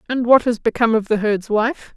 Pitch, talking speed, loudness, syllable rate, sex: 230 Hz, 245 wpm, -17 LUFS, 5.7 syllables/s, female